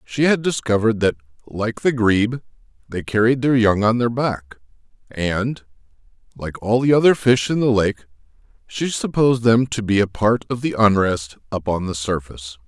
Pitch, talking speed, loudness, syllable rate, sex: 110 Hz, 175 wpm, -19 LUFS, 4.9 syllables/s, male